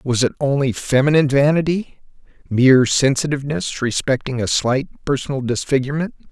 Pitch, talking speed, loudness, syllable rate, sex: 135 Hz, 105 wpm, -18 LUFS, 5.6 syllables/s, male